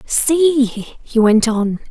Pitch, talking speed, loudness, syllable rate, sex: 245 Hz, 125 wpm, -15 LUFS, 2.3 syllables/s, female